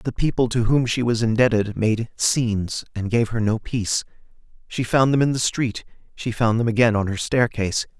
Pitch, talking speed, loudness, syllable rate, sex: 115 Hz, 205 wpm, -21 LUFS, 5.2 syllables/s, male